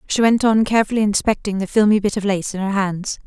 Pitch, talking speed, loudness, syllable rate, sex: 205 Hz, 240 wpm, -18 LUFS, 6.2 syllables/s, female